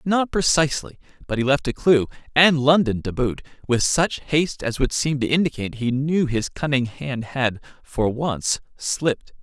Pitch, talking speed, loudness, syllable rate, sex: 140 Hz, 165 wpm, -21 LUFS, 4.7 syllables/s, male